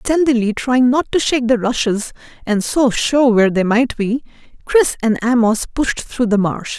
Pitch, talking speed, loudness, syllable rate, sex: 240 Hz, 185 wpm, -16 LUFS, 4.6 syllables/s, female